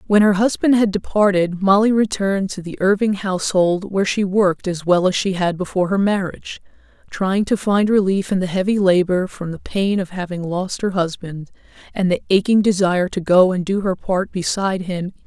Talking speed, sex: 220 wpm, female